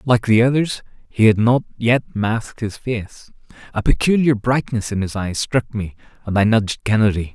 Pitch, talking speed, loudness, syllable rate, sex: 115 Hz, 180 wpm, -18 LUFS, 4.9 syllables/s, male